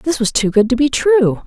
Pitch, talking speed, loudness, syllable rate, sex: 255 Hz, 285 wpm, -14 LUFS, 5.0 syllables/s, female